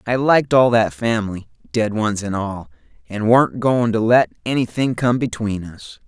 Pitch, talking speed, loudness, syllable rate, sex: 110 Hz, 180 wpm, -18 LUFS, 4.7 syllables/s, male